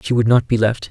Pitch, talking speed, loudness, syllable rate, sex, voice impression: 115 Hz, 330 wpm, -16 LUFS, 6.2 syllables/s, male, very masculine, adult-like, slightly middle-aged, thick, relaxed, weak, dark, very soft, muffled, slightly halting, cool, intellectual, slightly refreshing, very sincere, calm, slightly mature, friendly, slightly reassuring, slightly unique, very elegant, very sweet, very kind, very modest